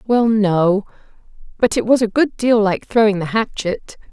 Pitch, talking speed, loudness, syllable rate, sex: 210 Hz, 175 wpm, -17 LUFS, 4.4 syllables/s, female